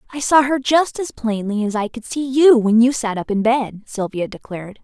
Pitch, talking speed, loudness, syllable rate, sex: 240 Hz, 235 wpm, -18 LUFS, 5.1 syllables/s, female